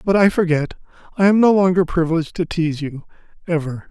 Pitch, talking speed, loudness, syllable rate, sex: 170 Hz, 170 wpm, -18 LUFS, 6.5 syllables/s, male